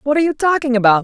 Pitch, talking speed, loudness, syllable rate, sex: 270 Hz, 290 wpm, -15 LUFS, 8.2 syllables/s, female